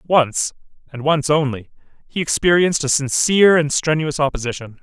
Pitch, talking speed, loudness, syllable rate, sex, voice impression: 150 Hz, 135 wpm, -17 LUFS, 5.1 syllables/s, male, very masculine, very adult-like, very middle-aged, very thick, tensed, slightly powerful, bright, soft, clear, fluent, cool, very intellectual, refreshing, very sincere, very calm, slightly mature, very friendly, very reassuring, slightly unique, elegant, slightly wild, very sweet, lively, kind